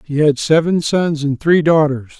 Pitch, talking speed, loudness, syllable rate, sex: 155 Hz, 190 wpm, -15 LUFS, 4.3 syllables/s, male